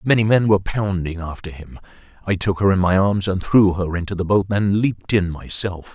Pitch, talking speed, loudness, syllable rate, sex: 95 Hz, 220 wpm, -19 LUFS, 5.4 syllables/s, male